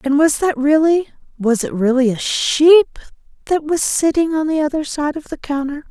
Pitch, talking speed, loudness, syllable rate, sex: 295 Hz, 185 wpm, -16 LUFS, 4.8 syllables/s, female